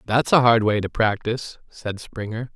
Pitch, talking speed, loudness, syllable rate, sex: 115 Hz, 190 wpm, -21 LUFS, 4.8 syllables/s, male